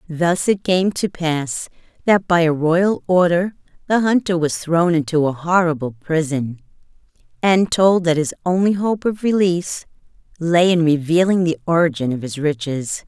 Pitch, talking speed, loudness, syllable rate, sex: 170 Hz, 155 wpm, -18 LUFS, 4.6 syllables/s, female